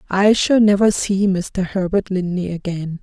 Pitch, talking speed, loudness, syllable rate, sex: 190 Hz, 160 wpm, -18 LUFS, 4.2 syllables/s, female